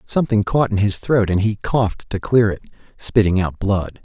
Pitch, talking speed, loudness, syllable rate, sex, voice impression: 105 Hz, 210 wpm, -18 LUFS, 5.1 syllables/s, male, very masculine, very middle-aged, very thick, slightly tensed, powerful, slightly dark, very soft, very muffled, fluent, raspy, very cool, intellectual, slightly refreshing, very sincere, very calm, very mature, very friendly, reassuring, very unique, elegant, wild, very sweet, slightly lively, kind, very modest